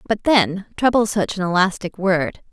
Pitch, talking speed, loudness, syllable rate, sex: 195 Hz, 190 wpm, -19 LUFS, 4.9 syllables/s, female